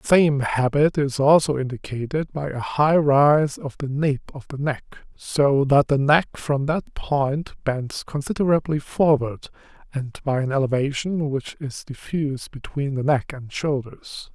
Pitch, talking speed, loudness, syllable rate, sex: 140 Hz, 160 wpm, -22 LUFS, 4.1 syllables/s, male